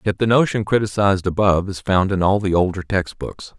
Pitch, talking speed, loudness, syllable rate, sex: 100 Hz, 220 wpm, -18 LUFS, 5.8 syllables/s, male